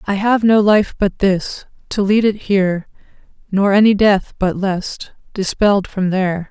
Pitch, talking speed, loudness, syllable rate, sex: 200 Hz, 165 wpm, -16 LUFS, 4.3 syllables/s, female